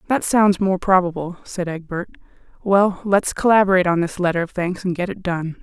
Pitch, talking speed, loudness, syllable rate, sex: 185 Hz, 190 wpm, -19 LUFS, 5.5 syllables/s, female